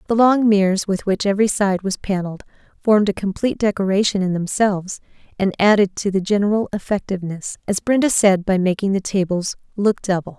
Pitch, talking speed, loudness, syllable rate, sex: 200 Hz, 175 wpm, -19 LUFS, 5.9 syllables/s, female